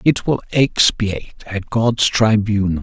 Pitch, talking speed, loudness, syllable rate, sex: 110 Hz, 125 wpm, -17 LUFS, 3.8 syllables/s, male